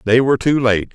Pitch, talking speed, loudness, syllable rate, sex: 125 Hz, 255 wpm, -15 LUFS, 6.2 syllables/s, male